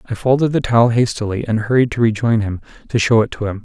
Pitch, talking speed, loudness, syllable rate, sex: 115 Hz, 245 wpm, -16 LUFS, 6.5 syllables/s, male